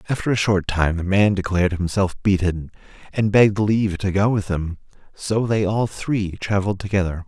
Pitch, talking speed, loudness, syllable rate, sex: 100 Hz, 180 wpm, -20 LUFS, 5.2 syllables/s, male